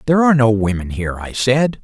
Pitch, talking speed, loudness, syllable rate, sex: 120 Hz, 230 wpm, -16 LUFS, 6.6 syllables/s, male